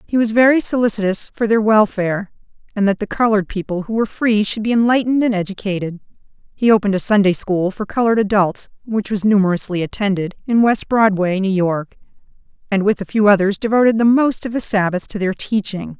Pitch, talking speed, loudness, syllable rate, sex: 205 Hz, 190 wpm, -17 LUFS, 6.0 syllables/s, female